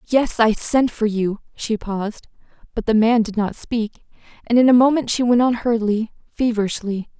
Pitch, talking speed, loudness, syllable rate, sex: 225 Hz, 185 wpm, -19 LUFS, 5.1 syllables/s, female